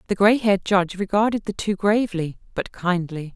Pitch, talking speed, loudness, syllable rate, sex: 195 Hz, 180 wpm, -22 LUFS, 5.7 syllables/s, female